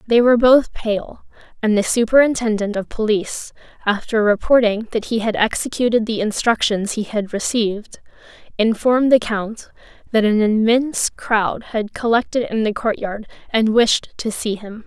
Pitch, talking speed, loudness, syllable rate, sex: 220 Hz, 150 wpm, -18 LUFS, 4.8 syllables/s, female